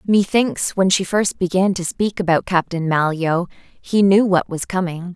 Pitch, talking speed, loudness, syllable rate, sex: 185 Hz, 175 wpm, -18 LUFS, 4.3 syllables/s, female